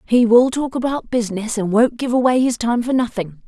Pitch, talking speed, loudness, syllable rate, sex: 235 Hz, 225 wpm, -18 LUFS, 5.4 syllables/s, female